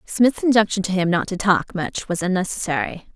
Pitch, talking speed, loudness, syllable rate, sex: 190 Hz, 190 wpm, -20 LUFS, 5.3 syllables/s, female